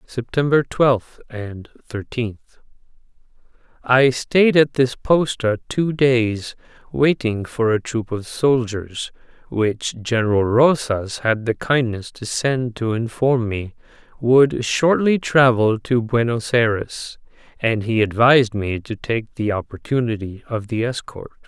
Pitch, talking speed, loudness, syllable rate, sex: 120 Hz, 125 wpm, -19 LUFS, 3.7 syllables/s, male